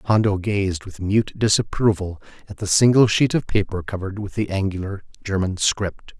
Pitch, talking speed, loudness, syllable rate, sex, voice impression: 100 Hz, 165 wpm, -21 LUFS, 5.0 syllables/s, male, masculine, adult-like, slightly fluent, cool, slightly intellectual, slightly sweet, slightly kind